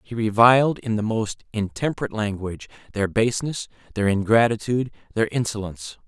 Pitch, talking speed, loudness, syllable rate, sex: 110 Hz, 130 wpm, -22 LUFS, 5.9 syllables/s, male